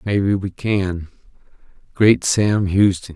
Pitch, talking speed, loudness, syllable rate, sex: 100 Hz, 95 wpm, -18 LUFS, 3.6 syllables/s, male